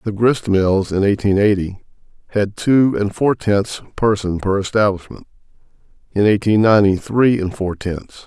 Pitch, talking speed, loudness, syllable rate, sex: 100 Hz, 150 wpm, -17 LUFS, 4.6 syllables/s, male